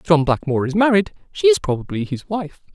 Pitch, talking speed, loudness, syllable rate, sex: 170 Hz, 220 wpm, -19 LUFS, 6.3 syllables/s, male